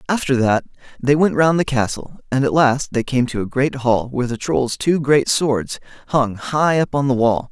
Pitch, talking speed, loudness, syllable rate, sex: 130 Hz, 225 wpm, -18 LUFS, 4.8 syllables/s, male